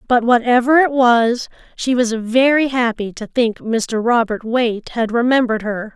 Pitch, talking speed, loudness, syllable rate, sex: 235 Hz, 160 wpm, -16 LUFS, 4.5 syllables/s, female